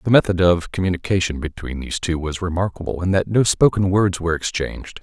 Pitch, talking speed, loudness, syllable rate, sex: 90 Hz, 190 wpm, -20 LUFS, 6.1 syllables/s, male